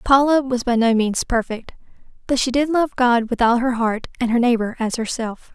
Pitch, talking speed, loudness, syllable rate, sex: 245 Hz, 215 wpm, -19 LUFS, 5.0 syllables/s, female